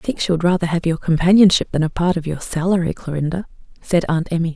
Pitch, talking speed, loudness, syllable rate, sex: 170 Hz, 235 wpm, -18 LUFS, 6.5 syllables/s, female